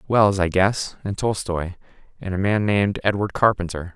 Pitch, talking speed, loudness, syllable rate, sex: 95 Hz, 165 wpm, -21 LUFS, 4.9 syllables/s, male